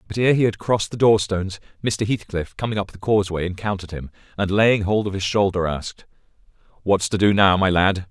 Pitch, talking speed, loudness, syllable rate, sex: 100 Hz, 205 wpm, -20 LUFS, 6.0 syllables/s, male